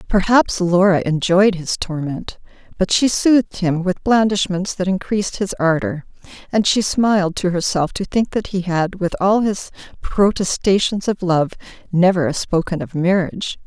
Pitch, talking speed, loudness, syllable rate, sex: 190 Hz, 155 wpm, -18 LUFS, 4.6 syllables/s, female